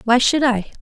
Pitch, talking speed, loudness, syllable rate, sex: 245 Hz, 220 wpm, -17 LUFS, 4.9 syllables/s, female